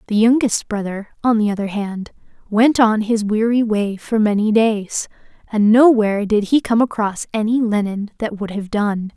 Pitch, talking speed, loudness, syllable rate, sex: 215 Hz, 175 wpm, -17 LUFS, 4.7 syllables/s, female